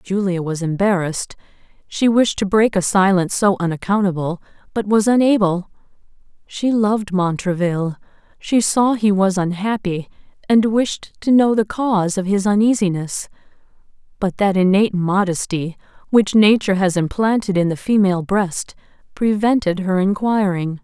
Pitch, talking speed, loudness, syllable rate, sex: 195 Hz, 130 wpm, -18 LUFS, 4.9 syllables/s, female